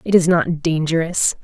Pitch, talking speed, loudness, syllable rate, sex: 165 Hz, 165 wpm, -18 LUFS, 4.7 syllables/s, female